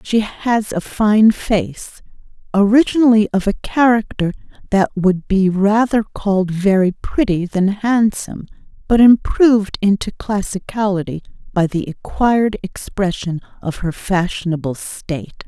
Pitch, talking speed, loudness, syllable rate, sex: 200 Hz, 110 wpm, -17 LUFS, 4.3 syllables/s, female